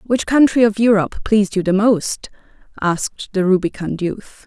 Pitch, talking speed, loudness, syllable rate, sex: 205 Hz, 160 wpm, -17 LUFS, 5.0 syllables/s, female